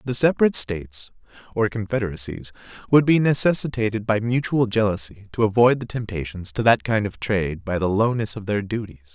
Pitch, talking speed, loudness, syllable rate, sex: 105 Hz, 170 wpm, -21 LUFS, 5.7 syllables/s, male